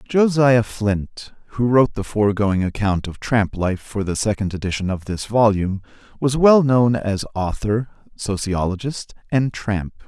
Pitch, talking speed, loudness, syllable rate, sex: 110 Hz, 150 wpm, -20 LUFS, 4.5 syllables/s, male